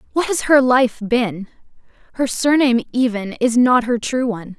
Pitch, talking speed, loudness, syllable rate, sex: 240 Hz, 170 wpm, -17 LUFS, 4.8 syllables/s, female